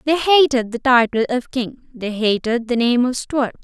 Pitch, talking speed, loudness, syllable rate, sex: 245 Hz, 200 wpm, -18 LUFS, 4.5 syllables/s, female